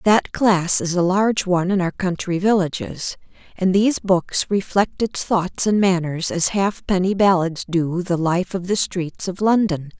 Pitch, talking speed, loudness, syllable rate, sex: 185 Hz, 180 wpm, -19 LUFS, 4.3 syllables/s, female